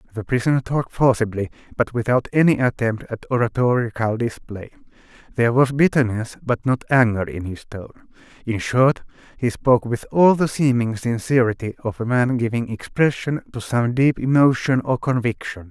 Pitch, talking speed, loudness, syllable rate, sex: 120 Hz, 155 wpm, -20 LUFS, 5.1 syllables/s, male